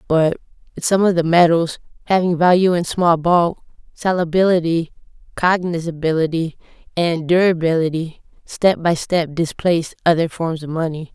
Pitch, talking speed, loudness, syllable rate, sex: 170 Hz, 120 wpm, -18 LUFS, 4.8 syllables/s, female